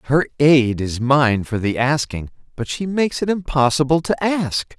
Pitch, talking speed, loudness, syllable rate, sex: 140 Hz, 165 wpm, -18 LUFS, 4.5 syllables/s, male